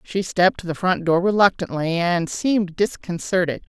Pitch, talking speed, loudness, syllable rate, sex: 180 Hz, 160 wpm, -21 LUFS, 5.0 syllables/s, female